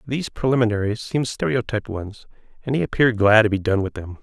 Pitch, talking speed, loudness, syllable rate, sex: 115 Hz, 200 wpm, -21 LUFS, 6.7 syllables/s, male